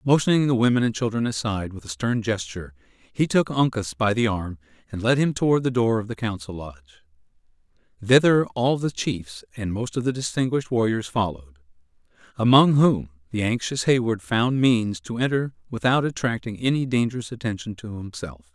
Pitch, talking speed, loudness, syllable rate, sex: 110 Hz, 170 wpm, -23 LUFS, 5.6 syllables/s, male